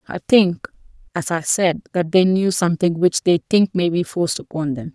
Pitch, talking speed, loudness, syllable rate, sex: 175 Hz, 205 wpm, -18 LUFS, 5.1 syllables/s, female